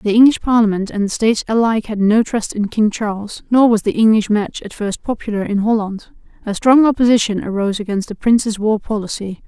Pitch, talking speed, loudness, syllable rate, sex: 215 Hz, 205 wpm, -16 LUFS, 5.8 syllables/s, female